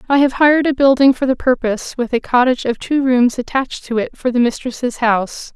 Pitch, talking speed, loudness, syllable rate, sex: 255 Hz, 225 wpm, -16 LUFS, 5.8 syllables/s, female